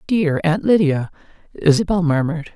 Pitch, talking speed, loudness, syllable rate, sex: 180 Hz, 120 wpm, -18 LUFS, 5.2 syllables/s, female